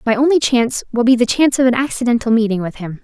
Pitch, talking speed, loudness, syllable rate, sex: 240 Hz, 255 wpm, -15 LUFS, 7.1 syllables/s, female